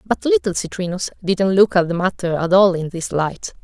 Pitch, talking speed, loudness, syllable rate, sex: 180 Hz, 215 wpm, -18 LUFS, 5.1 syllables/s, female